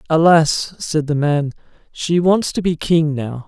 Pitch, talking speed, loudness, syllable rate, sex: 155 Hz, 170 wpm, -17 LUFS, 3.9 syllables/s, male